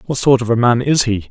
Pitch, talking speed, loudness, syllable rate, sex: 120 Hz, 320 wpm, -14 LUFS, 6.1 syllables/s, male